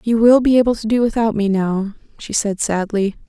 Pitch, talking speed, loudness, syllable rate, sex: 215 Hz, 220 wpm, -17 LUFS, 5.3 syllables/s, female